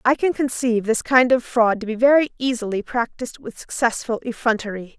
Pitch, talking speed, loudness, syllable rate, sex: 240 Hz, 180 wpm, -20 LUFS, 5.6 syllables/s, female